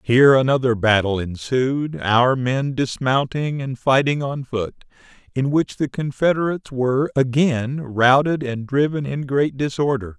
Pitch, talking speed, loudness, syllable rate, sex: 130 Hz, 135 wpm, -20 LUFS, 4.4 syllables/s, male